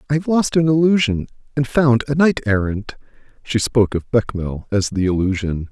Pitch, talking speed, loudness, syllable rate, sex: 120 Hz, 180 wpm, -18 LUFS, 5.3 syllables/s, male